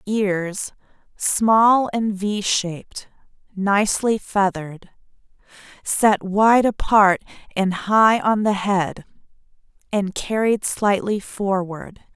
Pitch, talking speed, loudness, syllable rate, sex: 200 Hz, 90 wpm, -19 LUFS, 3.1 syllables/s, female